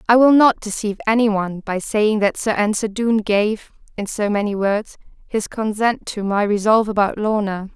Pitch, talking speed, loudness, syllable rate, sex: 210 Hz, 185 wpm, -18 LUFS, 4.9 syllables/s, female